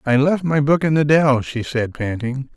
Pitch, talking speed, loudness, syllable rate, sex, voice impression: 140 Hz, 235 wpm, -18 LUFS, 4.6 syllables/s, male, very masculine, slightly middle-aged, slightly muffled, calm, mature, slightly wild